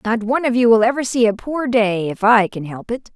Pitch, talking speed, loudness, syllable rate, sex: 225 Hz, 285 wpm, -17 LUFS, 5.6 syllables/s, female